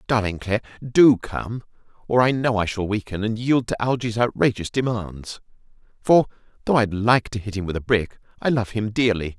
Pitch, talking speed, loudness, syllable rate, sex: 110 Hz, 200 wpm, -21 LUFS, 5.3 syllables/s, male